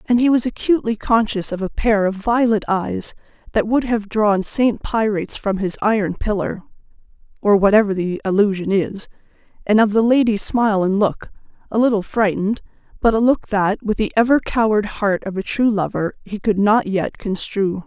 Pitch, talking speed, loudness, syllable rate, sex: 210 Hz, 170 wpm, -18 LUFS, 5.1 syllables/s, female